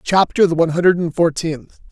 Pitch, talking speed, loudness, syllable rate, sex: 170 Hz, 190 wpm, -16 LUFS, 5.8 syllables/s, male